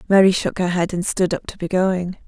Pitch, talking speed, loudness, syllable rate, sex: 185 Hz, 265 wpm, -20 LUFS, 5.4 syllables/s, female